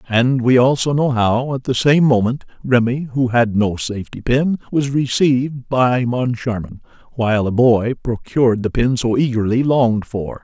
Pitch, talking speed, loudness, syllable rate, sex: 125 Hz, 165 wpm, -17 LUFS, 4.6 syllables/s, male